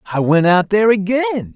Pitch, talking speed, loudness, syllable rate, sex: 205 Hz, 195 wpm, -15 LUFS, 7.1 syllables/s, male